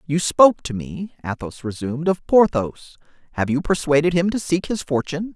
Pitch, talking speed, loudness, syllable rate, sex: 155 Hz, 180 wpm, -20 LUFS, 5.6 syllables/s, male